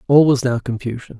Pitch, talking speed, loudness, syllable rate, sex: 125 Hz, 200 wpm, -18 LUFS, 5.9 syllables/s, male